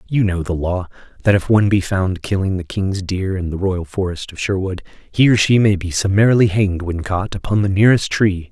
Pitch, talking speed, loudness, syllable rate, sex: 95 Hz, 225 wpm, -17 LUFS, 5.5 syllables/s, male